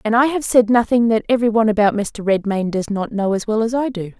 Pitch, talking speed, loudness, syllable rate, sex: 220 Hz, 270 wpm, -17 LUFS, 6.2 syllables/s, female